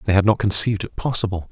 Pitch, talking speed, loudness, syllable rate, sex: 100 Hz, 235 wpm, -19 LUFS, 7.3 syllables/s, male